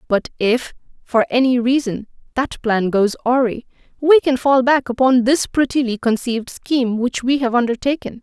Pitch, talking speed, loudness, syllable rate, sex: 250 Hz, 160 wpm, -17 LUFS, 5.1 syllables/s, female